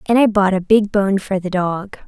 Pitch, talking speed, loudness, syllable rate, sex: 195 Hz, 260 wpm, -17 LUFS, 4.8 syllables/s, female